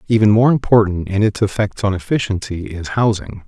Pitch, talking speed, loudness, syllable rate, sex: 100 Hz, 175 wpm, -17 LUFS, 5.4 syllables/s, male